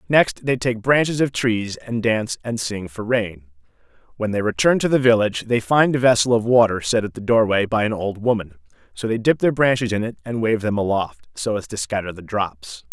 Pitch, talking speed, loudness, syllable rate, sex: 110 Hz, 230 wpm, -20 LUFS, 5.3 syllables/s, male